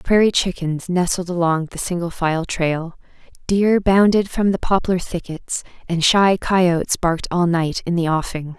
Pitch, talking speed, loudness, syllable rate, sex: 175 Hz, 160 wpm, -19 LUFS, 4.5 syllables/s, female